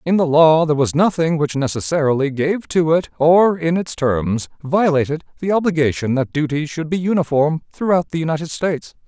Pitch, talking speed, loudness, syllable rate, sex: 155 Hz, 180 wpm, -18 LUFS, 5.3 syllables/s, male